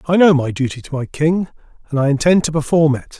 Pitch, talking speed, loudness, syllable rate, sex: 150 Hz, 245 wpm, -16 LUFS, 6.0 syllables/s, male